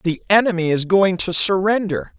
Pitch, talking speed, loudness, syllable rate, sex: 180 Hz, 165 wpm, -17 LUFS, 4.8 syllables/s, male